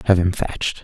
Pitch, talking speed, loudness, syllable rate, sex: 90 Hz, 215 wpm, -20 LUFS, 6.2 syllables/s, male